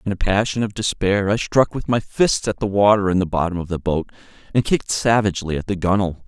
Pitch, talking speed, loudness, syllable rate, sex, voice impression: 100 Hz, 240 wpm, -20 LUFS, 6.2 syllables/s, male, masculine, adult-like, slightly tensed, powerful, clear, intellectual, calm, slightly mature, reassuring, wild, lively